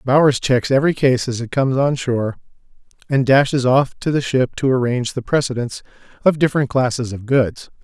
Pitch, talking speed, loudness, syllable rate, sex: 130 Hz, 185 wpm, -18 LUFS, 5.8 syllables/s, male